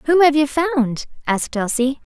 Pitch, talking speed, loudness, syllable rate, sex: 280 Hz, 165 wpm, -19 LUFS, 4.5 syllables/s, female